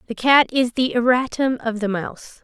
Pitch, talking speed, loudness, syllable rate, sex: 245 Hz, 195 wpm, -19 LUFS, 5.1 syllables/s, female